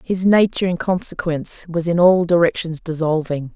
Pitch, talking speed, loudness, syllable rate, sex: 170 Hz, 150 wpm, -18 LUFS, 5.3 syllables/s, female